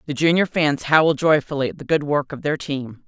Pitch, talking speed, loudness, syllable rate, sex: 145 Hz, 235 wpm, -20 LUFS, 5.5 syllables/s, female